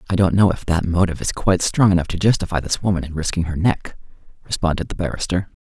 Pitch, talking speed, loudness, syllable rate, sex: 90 Hz, 225 wpm, -20 LUFS, 6.8 syllables/s, male